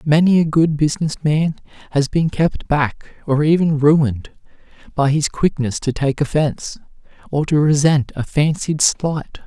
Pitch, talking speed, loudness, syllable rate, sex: 150 Hz, 150 wpm, -17 LUFS, 4.4 syllables/s, male